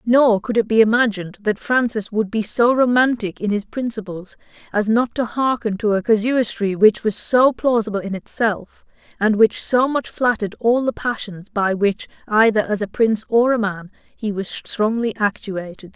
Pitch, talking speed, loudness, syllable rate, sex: 220 Hz, 180 wpm, -19 LUFS, 4.8 syllables/s, female